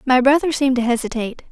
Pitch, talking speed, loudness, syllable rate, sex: 260 Hz, 200 wpm, -18 LUFS, 7.4 syllables/s, female